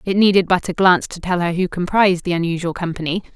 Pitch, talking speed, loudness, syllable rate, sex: 180 Hz, 230 wpm, -18 LUFS, 6.7 syllables/s, female